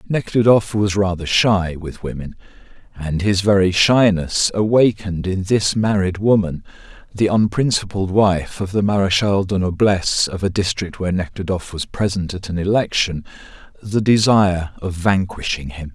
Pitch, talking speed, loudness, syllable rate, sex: 95 Hz, 145 wpm, -18 LUFS, 4.8 syllables/s, male